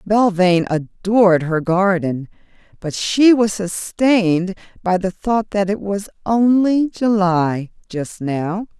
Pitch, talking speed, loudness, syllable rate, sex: 195 Hz, 125 wpm, -17 LUFS, 3.7 syllables/s, female